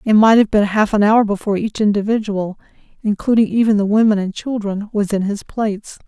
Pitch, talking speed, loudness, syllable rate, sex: 210 Hz, 195 wpm, -16 LUFS, 5.7 syllables/s, female